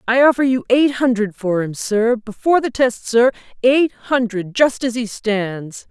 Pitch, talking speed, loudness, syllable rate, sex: 235 Hz, 185 wpm, -17 LUFS, 4.3 syllables/s, female